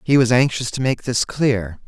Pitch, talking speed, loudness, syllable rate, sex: 120 Hz, 225 wpm, -19 LUFS, 4.6 syllables/s, male